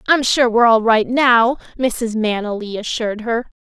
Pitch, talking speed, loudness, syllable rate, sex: 230 Hz, 200 wpm, -16 LUFS, 5.4 syllables/s, female